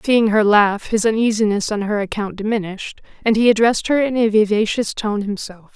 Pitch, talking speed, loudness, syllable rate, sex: 215 Hz, 190 wpm, -17 LUFS, 5.6 syllables/s, female